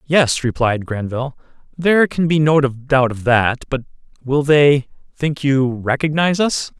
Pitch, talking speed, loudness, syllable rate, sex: 140 Hz, 150 wpm, -17 LUFS, 4.2 syllables/s, male